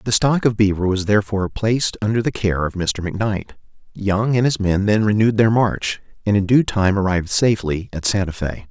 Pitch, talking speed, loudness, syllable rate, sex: 105 Hz, 205 wpm, -19 LUFS, 5.8 syllables/s, male